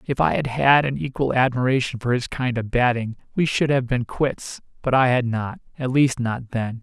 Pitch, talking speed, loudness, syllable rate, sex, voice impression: 125 Hz, 220 wpm, -21 LUFS, 4.9 syllables/s, male, very masculine, very adult-like, thick, relaxed, weak, slightly bright, soft, slightly muffled, fluent, cool, very intellectual, refreshing, very sincere, very calm, slightly mature, friendly, reassuring, slightly unique, elegant, sweet, lively, very kind, modest